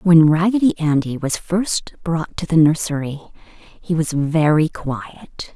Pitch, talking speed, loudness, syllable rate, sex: 160 Hz, 140 wpm, -18 LUFS, 3.7 syllables/s, female